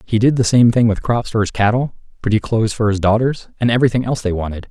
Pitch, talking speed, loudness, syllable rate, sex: 110 Hz, 255 wpm, -16 LUFS, 6.8 syllables/s, male